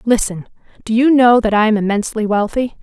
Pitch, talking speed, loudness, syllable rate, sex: 225 Hz, 190 wpm, -14 LUFS, 6.0 syllables/s, female